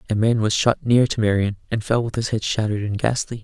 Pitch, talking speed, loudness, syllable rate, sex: 110 Hz, 260 wpm, -21 LUFS, 6.2 syllables/s, male